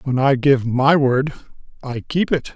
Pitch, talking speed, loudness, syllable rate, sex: 135 Hz, 190 wpm, -18 LUFS, 4.2 syllables/s, male